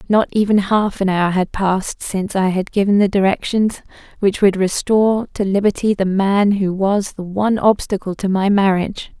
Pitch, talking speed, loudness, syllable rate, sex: 195 Hz, 185 wpm, -17 LUFS, 5.1 syllables/s, female